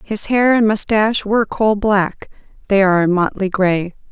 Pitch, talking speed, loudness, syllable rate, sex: 205 Hz, 175 wpm, -16 LUFS, 4.9 syllables/s, female